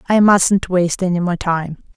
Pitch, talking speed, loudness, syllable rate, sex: 180 Hz, 185 wpm, -16 LUFS, 4.7 syllables/s, female